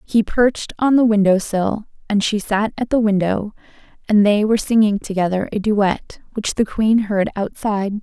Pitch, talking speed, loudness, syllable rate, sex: 210 Hz, 180 wpm, -18 LUFS, 4.8 syllables/s, female